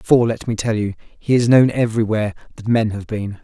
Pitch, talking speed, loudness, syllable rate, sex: 110 Hz, 225 wpm, -18 LUFS, 5.7 syllables/s, male